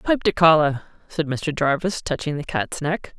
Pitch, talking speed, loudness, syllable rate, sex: 155 Hz, 190 wpm, -21 LUFS, 4.5 syllables/s, female